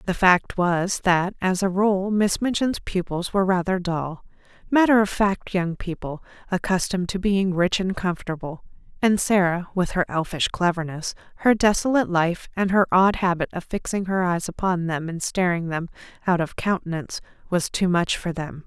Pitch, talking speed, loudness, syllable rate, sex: 185 Hz, 175 wpm, -23 LUFS, 4.9 syllables/s, female